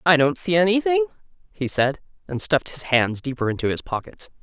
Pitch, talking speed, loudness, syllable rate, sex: 165 Hz, 190 wpm, -22 LUFS, 5.8 syllables/s, female